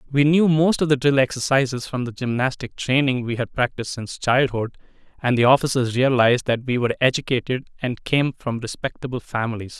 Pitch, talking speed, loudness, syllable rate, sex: 130 Hz, 180 wpm, -21 LUFS, 5.9 syllables/s, male